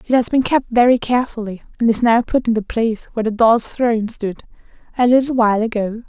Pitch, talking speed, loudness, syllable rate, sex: 230 Hz, 215 wpm, -17 LUFS, 6.1 syllables/s, female